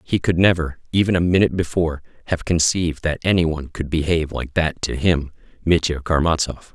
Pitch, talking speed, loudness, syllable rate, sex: 80 Hz, 180 wpm, -20 LUFS, 6.2 syllables/s, male